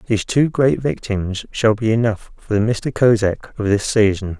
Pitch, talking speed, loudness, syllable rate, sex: 110 Hz, 190 wpm, -18 LUFS, 4.8 syllables/s, male